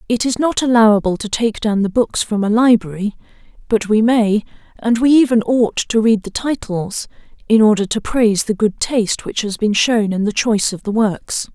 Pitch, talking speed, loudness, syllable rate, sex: 220 Hz, 210 wpm, -16 LUFS, 5.1 syllables/s, female